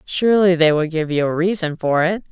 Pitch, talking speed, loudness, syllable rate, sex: 170 Hz, 235 wpm, -17 LUFS, 5.6 syllables/s, female